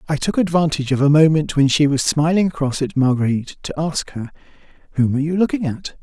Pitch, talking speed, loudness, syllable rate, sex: 150 Hz, 210 wpm, -18 LUFS, 6.3 syllables/s, male